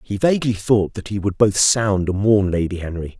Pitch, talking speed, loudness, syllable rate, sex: 100 Hz, 225 wpm, -18 LUFS, 5.2 syllables/s, male